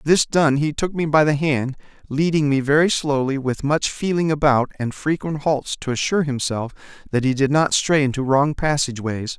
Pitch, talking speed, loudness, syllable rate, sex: 145 Hz, 190 wpm, -20 LUFS, 5.1 syllables/s, male